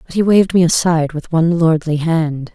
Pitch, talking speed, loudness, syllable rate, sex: 165 Hz, 210 wpm, -15 LUFS, 5.8 syllables/s, female